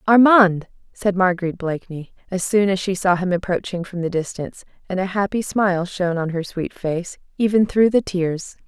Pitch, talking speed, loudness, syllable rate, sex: 185 Hz, 185 wpm, -20 LUFS, 5.4 syllables/s, female